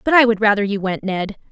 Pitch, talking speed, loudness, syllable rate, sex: 210 Hz, 280 wpm, -17 LUFS, 6.1 syllables/s, female